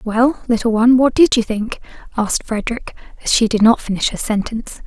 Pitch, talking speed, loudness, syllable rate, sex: 230 Hz, 195 wpm, -16 LUFS, 5.9 syllables/s, female